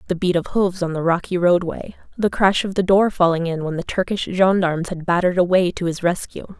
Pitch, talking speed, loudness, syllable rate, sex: 180 Hz, 235 wpm, -19 LUFS, 5.7 syllables/s, female